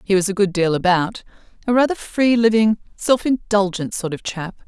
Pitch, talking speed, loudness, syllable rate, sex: 205 Hz, 180 wpm, -19 LUFS, 5.1 syllables/s, female